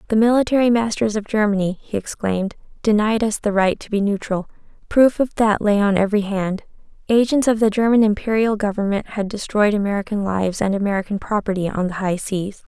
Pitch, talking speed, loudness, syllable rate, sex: 210 Hz, 180 wpm, -19 LUFS, 5.8 syllables/s, female